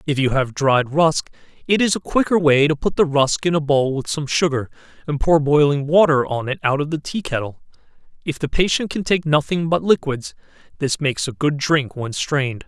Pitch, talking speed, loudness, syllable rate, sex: 145 Hz, 220 wpm, -19 LUFS, 5.2 syllables/s, male